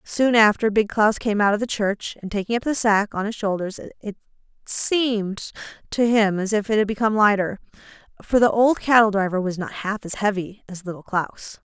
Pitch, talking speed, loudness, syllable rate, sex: 210 Hz, 205 wpm, -21 LUFS, 5.1 syllables/s, female